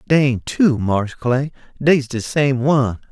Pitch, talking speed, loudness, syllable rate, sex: 130 Hz, 155 wpm, -18 LUFS, 3.9 syllables/s, male